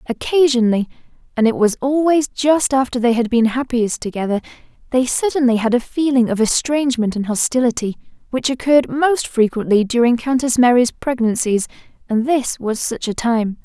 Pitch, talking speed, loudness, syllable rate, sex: 245 Hz, 155 wpm, -17 LUFS, 5.3 syllables/s, female